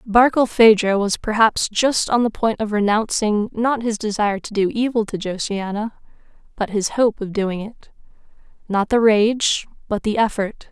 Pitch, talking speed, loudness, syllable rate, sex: 215 Hz, 160 wpm, -19 LUFS, 4.6 syllables/s, female